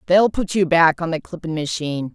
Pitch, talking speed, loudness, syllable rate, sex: 170 Hz, 195 wpm, -19 LUFS, 5.6 syllables/s, female